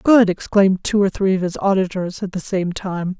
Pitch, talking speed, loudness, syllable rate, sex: 190 Hz, 225 wpm, -19 LUFS, 5.2 syllables/s, female